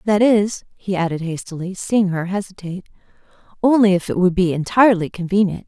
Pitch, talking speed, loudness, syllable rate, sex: 190 Hz, 160 wpm, -18 LUFS, 5.8 syllables/s, female